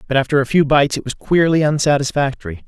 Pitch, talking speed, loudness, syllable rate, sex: 140 Hz, 200 wpm, -16 LUFS, 6.8 syllables/s, male